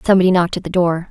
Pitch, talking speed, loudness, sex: 180 Hz, 270 wpm, -16 LUFS, female